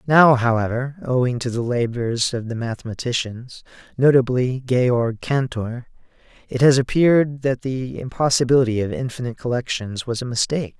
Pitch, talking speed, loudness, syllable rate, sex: 125 Hz, 135 wpm, -20 LUFS, 5.1 syllables/s, male